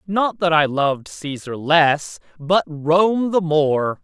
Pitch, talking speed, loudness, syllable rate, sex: 160 Hz, 150 wpm, -18 LUFS, 3.3 syllables/s, male